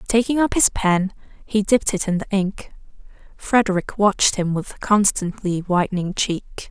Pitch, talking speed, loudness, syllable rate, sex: 200 Hz, 150 wpm, -20 LUFS, 4.6 syllables/s, female